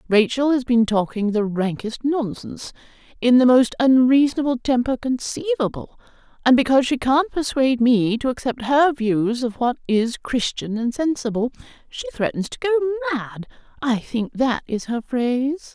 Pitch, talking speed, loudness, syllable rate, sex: 255 Hz, 150 wpm, -20 LUFS, 4.8 syllables/s, female